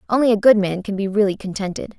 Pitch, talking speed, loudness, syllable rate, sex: 205 Hz, 240 wpm, -19 LUFS, 6.8 syllables/s, female